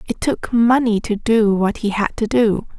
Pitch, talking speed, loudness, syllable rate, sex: 220 Hz, 215 wpm, -17 LUFS, 4.5 syllables/s, female